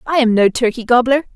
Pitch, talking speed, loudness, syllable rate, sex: 245 Hz, 220 wpm, -14 LUFS, 6.1 syllables/s, female